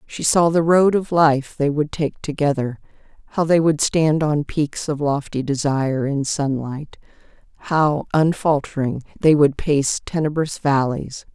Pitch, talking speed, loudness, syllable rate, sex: 150 Hz, 150 wpm, -19 LUFS, 4.2 syllables/s, female